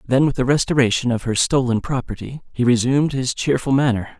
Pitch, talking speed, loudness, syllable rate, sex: 130 Hz, 185 wpm, -19 LUFS, 5.9 syllables/s, male